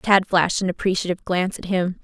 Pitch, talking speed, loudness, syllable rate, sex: 185 Hz, 205 wpm, -21 LUFS, 6.5 syllables/s, female